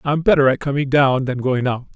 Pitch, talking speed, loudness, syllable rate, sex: 135 Hz, 245 wpm, -17 LUFS, 5.6 syllables/s, male